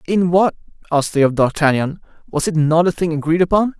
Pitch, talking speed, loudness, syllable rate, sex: 165 Hz, 205 wpm, -17 LUFS, 6.0 syllables/s, male